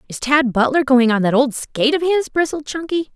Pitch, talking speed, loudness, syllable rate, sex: 275 Hz, 230 wpm, -17 LUFS, 5.7 syllables/s, female